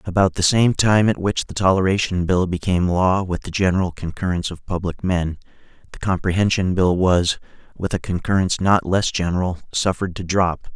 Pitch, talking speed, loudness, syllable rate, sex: 90 Hz, 175 wpm, -20 LUFS, 5.5 syllables/s, male